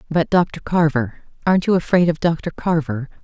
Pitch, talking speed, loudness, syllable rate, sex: 160 Hz, 150 wpm, -19 LUFS, 4.8 syllables/s, female